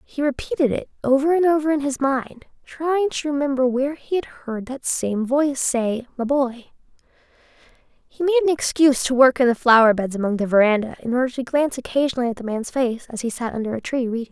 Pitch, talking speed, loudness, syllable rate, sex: 260 Hz, 215 wpm, -20 LUFS, 5.8 syllables/s, female